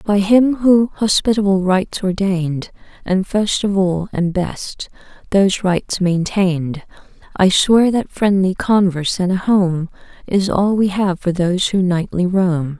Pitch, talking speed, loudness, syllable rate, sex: 190 Hz, 150 wpm, -16 LUFS, 4.3 syllables/s, female